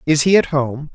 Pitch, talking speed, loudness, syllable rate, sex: 150 Hz, 255 wpm, -16 LUFS, 5.0 syllables/s, male